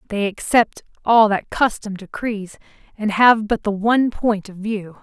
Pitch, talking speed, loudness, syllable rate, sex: 210 Hz, 165 wpm, -19 LUFS, 4.3 syllables/s, female